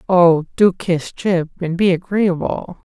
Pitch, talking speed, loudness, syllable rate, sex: 175 Hz, 145 wpm, -17 LUFS, 3.8 syllables/s, male